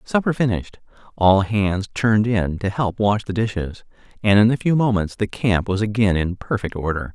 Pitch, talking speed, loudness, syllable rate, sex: 105 Hz, 195 wpm, -20 LUFS, 5.2 syllables/s, male